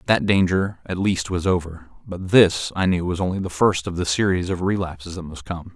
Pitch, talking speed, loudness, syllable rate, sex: 90 Hz, 230 wpm, -21 LUFS, 5.2 syllables/s, male